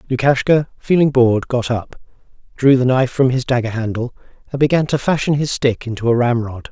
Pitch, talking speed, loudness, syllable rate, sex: 130 Hz, 190 wpm, -16 LUFS, 5.8 syllables/s, male